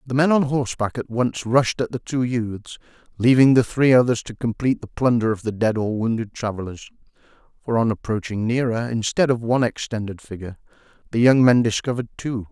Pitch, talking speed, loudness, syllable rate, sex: 120 Hz, 185 wpm, -21 LUFS, 5.7 syllables/s, male